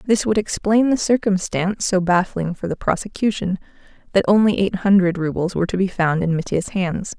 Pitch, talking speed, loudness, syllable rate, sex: 190 Hz, 185 wpm, -19 LUFS, 5.4 syllables/s, female